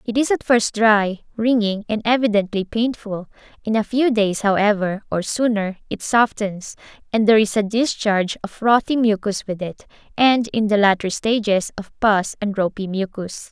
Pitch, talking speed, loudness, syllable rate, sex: 215 Hz, 170 wpm, -19 LUFS, 4.7 syllables/s, female